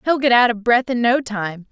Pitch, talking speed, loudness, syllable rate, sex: 235 Hz, 280 wpm, -17 LUFS, 5.0 syllables/s, female